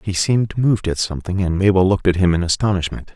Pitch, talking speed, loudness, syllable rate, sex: 95 Hz, 230 wpm, -18 LUFS, 6.9 syllables/s, male